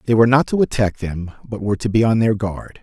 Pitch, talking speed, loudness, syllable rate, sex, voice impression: 110 Hz, 275 wpm, -18 LUFS, 6.3 syllables/s, male, very masculine, very adult-like, very middle-aged, very thick, slightly relaxed, powerful, slightly dark, soft, slightly muffled, fluent, slightly raspy, cool, very intellectual, sincere, very calm, very mature, friendly, reassuring, unique, slightly elegant, wild, sweet, slightly lively, very kind, modest